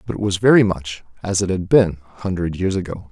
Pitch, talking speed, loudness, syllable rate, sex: 95 Hz, 250 wpm, -19 LUFS, 6.0 syllables/s, male